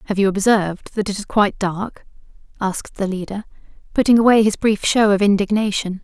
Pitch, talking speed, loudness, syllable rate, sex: 205 Hz, 180 wpm, -18 LUFS, 5.8 syllables/s, female